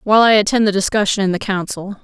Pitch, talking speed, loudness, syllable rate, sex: 200 Hz, 235 wpm, -15 LUFS, 6.7 syllables/s, female